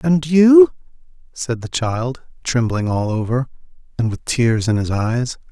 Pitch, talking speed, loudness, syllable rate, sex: 120 Hz, 150 wpm, -17 LUFS, 4.0 syllables/s, male